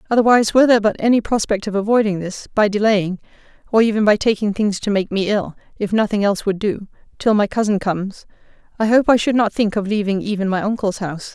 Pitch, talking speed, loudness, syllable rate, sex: 210 Hz, 215 wpm, -18 LUFS, 5.2 syllables/s, female